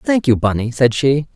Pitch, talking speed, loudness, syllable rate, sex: 130 Hz, 220 wpm, -16 LUFS, 5.0 syllables/s, male